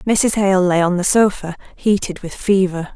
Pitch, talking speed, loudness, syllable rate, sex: 190 Hz, 185 wpm, -16 LUFS, 4.5 syllables/s, female